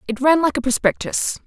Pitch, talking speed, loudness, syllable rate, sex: 275 Hz, 205 wpm, -19 LUFS, 5.6 syllables/s, female